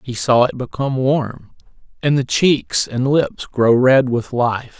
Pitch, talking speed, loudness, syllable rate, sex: 125 Hz, 175 wpm, -17 LUFS, 3.9 syllables/s, male